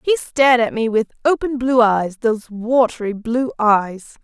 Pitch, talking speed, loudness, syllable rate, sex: 240 Hz, 155 wpm, -17 LUFS, 4.6 syllables/s, female